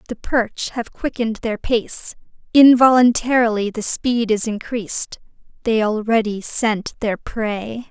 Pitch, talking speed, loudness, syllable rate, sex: 225 Hz, 120 wpm, -18 LUFS, 4.0 syllables/s, female